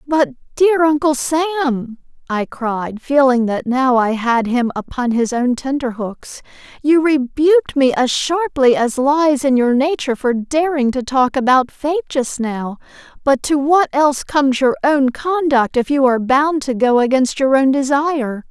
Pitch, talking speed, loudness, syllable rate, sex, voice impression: 270 Hz, 170 wpm, -16 LUFS, 4.4 syllables/s, female, very feminine, very young, very thin, tensed, slightly weak, very bright, slightly soft, very clear, very fluent, very cute, intellectual, very refreshing, very sincere, calm, very mature, very friendly, very reassuring, very unique, elegant, slightly wild, very sweet, slightly lively, very kind, slightly sharp, modest, light